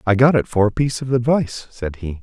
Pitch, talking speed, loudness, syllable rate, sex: 115 Hz, 270 wpm, -19 LUFS, 6.3 syllables/s, male